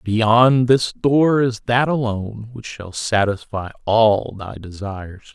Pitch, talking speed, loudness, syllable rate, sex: 110 Hz, 135 wpm, -18 LUFS, 3.6 syllables/s, male